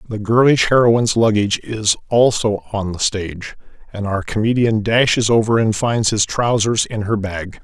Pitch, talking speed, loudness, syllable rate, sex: 110 Hz, 165 wpm, -17 LUFS, 4.9 syllables/s, male